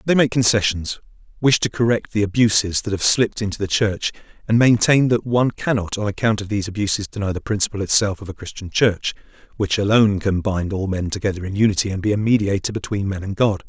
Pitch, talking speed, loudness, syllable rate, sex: 105 Hz, 215 wpm, -19 LUFS, 6.2 syllables/s, male